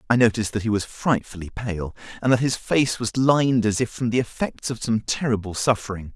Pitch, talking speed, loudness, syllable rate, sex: 115 Hz, 215 wpm, -23 LUFS, 5.6 syllables/s, male